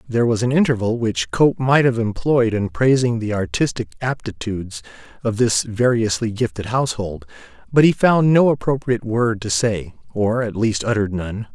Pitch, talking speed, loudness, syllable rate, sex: 115 Hz, 160 wpm, -19 LUFS, 5.1 syllables/s, male